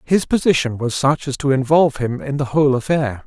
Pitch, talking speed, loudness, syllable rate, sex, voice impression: 140 Hz, 220 wpm, -18 LUFS, 5.7 syllables/s, male, masculine, adult-like, tensed, bright, slightly soft, fluent, cool, intellectual, slightly sincere, friendly, wild, lively